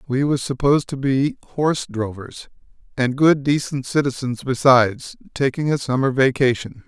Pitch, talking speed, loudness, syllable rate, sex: 135 Hz, 140 wpm, -19 LUFS, 5.0 syllables/s, male